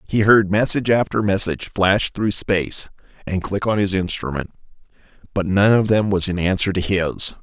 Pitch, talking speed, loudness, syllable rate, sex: 100 Hz, 180 wpm, -19 LUFS, 5.1 syllables/s, male